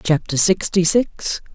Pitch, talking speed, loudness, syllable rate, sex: 170 Hz, 115 wpm, -17 LUFS, 3.7 syllables/s, female